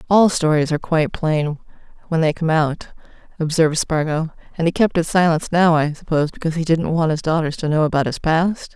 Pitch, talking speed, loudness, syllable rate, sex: 160 Hz, 190 wpm, -19 LUFS, 5.9 syllables/s, female